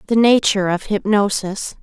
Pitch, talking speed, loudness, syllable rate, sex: 205 Hz, 130 wpm, -17 LUFS, 5.0 syllables/s, female